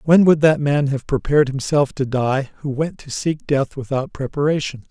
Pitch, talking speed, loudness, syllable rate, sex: 140 Hz, 195 wpm, -19 LUFS, 5.0 syllables/s, male